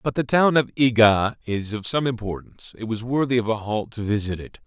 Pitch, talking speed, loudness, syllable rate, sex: 115 Hz, 255 wpm, -22 LUFS, 5.7 syllables/s, male